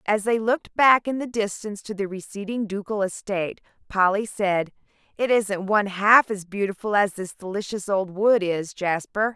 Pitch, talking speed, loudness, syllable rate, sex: 205 Hz, 175 wpm, -23 LUFS, 4.9 syllables/s, female